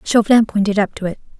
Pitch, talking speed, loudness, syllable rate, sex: 205 Hz, 215 wpm, -16 LUFS, 7.1 syllables/s, female